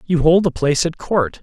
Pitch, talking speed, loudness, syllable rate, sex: 160 Hz, 250 wpm, -17 LUFS, 5.3 syllables/s, male